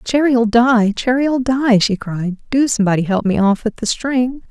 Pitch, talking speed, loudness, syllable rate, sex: 235 Hz, 175 wpm, -16 LUFS, 4.5 syllables/s, female